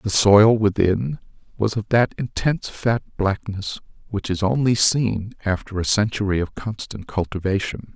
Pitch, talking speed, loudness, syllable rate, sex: 105 Hz, 145 wpm, -21 LUFS, 4.5 syllables/s, male